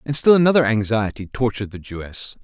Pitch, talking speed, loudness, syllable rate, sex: 115 Hz, 175 wpm, -18 LUFS, 6.2 syllables/s, male